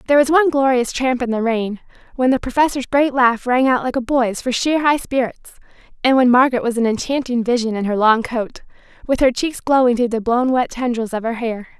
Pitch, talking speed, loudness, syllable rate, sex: 250 Hz, 230 wpm, -17 LUFS, 5.7 syllables/s, female